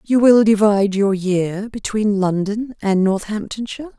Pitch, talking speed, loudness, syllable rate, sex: 210 Hz, 135 wpm, -17 LUFS, 4.5 syllables/s, female